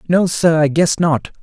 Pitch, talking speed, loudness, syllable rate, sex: 160 Hz, 210 wpm, -15 LUFS, 4.3 syllables/s, male